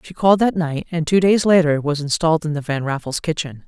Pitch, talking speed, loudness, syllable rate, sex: 160 Hz, 245 wpm, -18 LUFS, 6.0 syllables/s, female